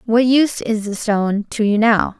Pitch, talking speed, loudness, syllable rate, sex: 220 Hz, 220 wpm, -17 LUFS, 4.9 syllables/s, female